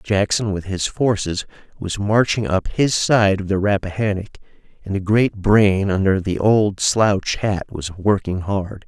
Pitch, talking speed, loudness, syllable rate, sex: 100 Hz, 160 wpm, -19 LUFS, 4.0 syllables/s, male